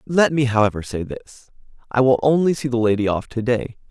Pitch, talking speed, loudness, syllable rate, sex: 120 Hz, 215 wpm, -19 LUFS, 5.5 syllables/s, male